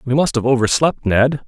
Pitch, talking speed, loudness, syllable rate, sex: 130 Hz, 205 wpm, -16 LUFS, 5.3 syllables/s, male